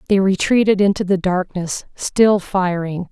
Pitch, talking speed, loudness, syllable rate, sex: 190 Hz, 135 wpm, -17 LUFS, 4.2 syllables/s, female